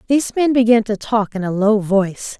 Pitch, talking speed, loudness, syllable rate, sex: 220 Hz, 225 wpm, -17 LUFS, 5.5 syllables/s, female